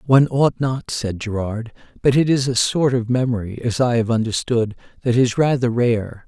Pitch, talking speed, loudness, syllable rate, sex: 120 Hz, 190 wpm, -19 LUFS, 4.9 syllables/s, male